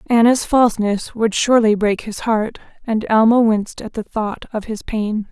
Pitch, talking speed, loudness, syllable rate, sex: 220 Hz, 180 wpm, -17 LUFS, 4.7 syllables/s, female